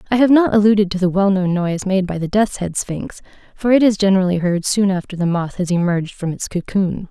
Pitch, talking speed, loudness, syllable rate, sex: 190 Hz, 235 wpm, -17 LUFS, 5.9 syllables/s, female